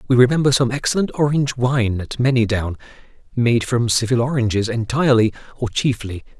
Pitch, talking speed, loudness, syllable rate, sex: 120 Hz, 140 wpm, -18 LUFS, 5.9 syllables/s, male